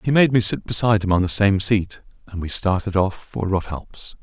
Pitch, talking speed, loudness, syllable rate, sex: 100 Hz, 225 wpm, -20 LUFS, 5.2 syllables/s, male